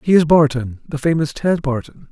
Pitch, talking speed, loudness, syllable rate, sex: 150 Hz, 170 wpm, -17 LUFS, 5.3 syllables/s, male